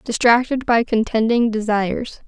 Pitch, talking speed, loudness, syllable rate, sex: 230 Hz, 105 wpm, -18 LUFS, 4.7 syllables/s, female